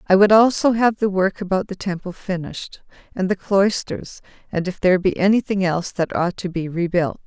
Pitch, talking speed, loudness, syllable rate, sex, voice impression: 190 Hz, 205 wpm, -20 LUFS, 5.4 syllables/s, female, very feminine, adult-like, thin, slightly relaxed, slightly weak, slightly bright, slightly soft, clear, fluent, cute, slightly cool, intellectual, refreshing, very sincere, very calm, friendly, reassuring, slightly unique, elegant, slightly wild, sweet, lively, kind, slightly modest, slightly light